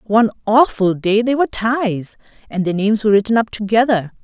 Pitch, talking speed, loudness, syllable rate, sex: 215 Hz, 185 wpm, -16 LUFS, 5.8 syllables/s, female